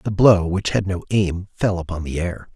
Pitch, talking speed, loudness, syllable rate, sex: 90 Hz, 235 wpm, -20 LUFS, 4.7 syllables/s, male